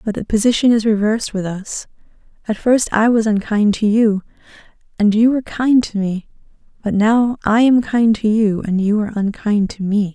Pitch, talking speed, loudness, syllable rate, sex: 215 Hz, 195 wpm, -16 LUFS, 5.1 syllables/s, female